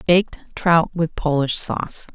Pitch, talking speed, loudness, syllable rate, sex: 165 Hz, 140 wpm, -20 LUFS, 4.6 syllables/s, female